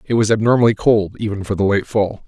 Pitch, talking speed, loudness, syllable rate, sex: 105 Hz, 235 wpm, -17 LUFS, 6.1 syllables/s, male